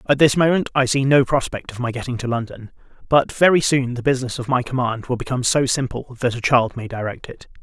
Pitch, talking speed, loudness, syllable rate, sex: 130 Hz, 235 wpm, -19 LUFS, 6.1 syllables/s, male